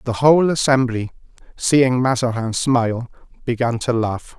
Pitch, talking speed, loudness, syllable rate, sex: 125 Hz, 125 wpm, -18 LUFS, 4.6 syllables/s, male